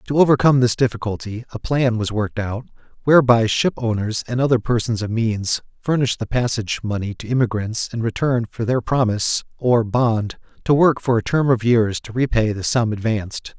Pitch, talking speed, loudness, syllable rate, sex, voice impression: 115 Hz, 180 wpm, -19 LUFS, 5.4 syllables/s, male, very masculine, very adult-like, very middle-aged, very thick, slightly tensed, slightly weak, bright, soft, clear, fluent, slightly raspy, cool, very intellectual, slightly refreshing, very sincere, very calm, very mature, very friendly, very reassuring, unique, very elegant, slightly wild, sweet, lively, very kind, modest